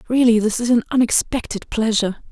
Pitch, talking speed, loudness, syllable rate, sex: 230 Hz, 155 wpm, -18 LUFS, 6.0 syllables/s, female